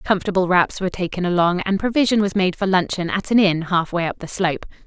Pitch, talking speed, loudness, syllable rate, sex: 185 Hz, 235 wpm, -19 LUFS, 6.3 syllables/s, female